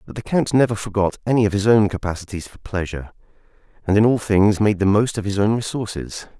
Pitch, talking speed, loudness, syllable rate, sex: 105 Hz, 215 wpm, -19 LUFS, 6.2 syllables/s, male